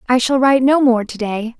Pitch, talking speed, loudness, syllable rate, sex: 245 Hz, 265 wpm, -15 LUFS, 5.7 syllables/s, female